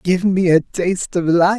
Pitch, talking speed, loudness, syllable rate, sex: 180 Hz, 225 wpm, -16 LUFS, 4.6 syllables/s, male